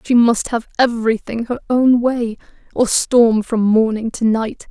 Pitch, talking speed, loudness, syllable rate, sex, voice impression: 230 Hz, 165 wpm, -16 LUFS, 4.2 syllables/s, female, feminine, slightly young, slightly adult-like, very thin, very relaxed, very weak, very dark, clear, fluent, slightly raspy, very cute, intellectual, very friendly, very reassuring, very unique, elegant, sweet, very kind, very modest